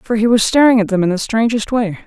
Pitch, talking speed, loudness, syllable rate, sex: 220 Hz, 290 wpm, -14 LUFS, 6.1 syllables/s, female